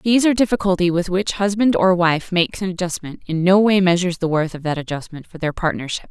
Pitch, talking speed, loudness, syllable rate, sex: 180 Hz, 235 wpm, -19 LUFS, 6.2 syllables/s, female